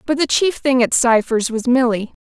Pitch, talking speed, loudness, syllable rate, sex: 250 Hz, 215 wpm, -16 LUFS, 4.9 syllables/s, female